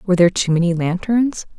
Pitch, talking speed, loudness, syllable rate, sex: 190 Hz, 190 wpm, -17 LUFS, 6.2 syllables/s, female